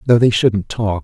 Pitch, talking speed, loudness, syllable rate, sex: 110 Hz, 230 wpm, -15 LUFS, 4.4 syllables/s, male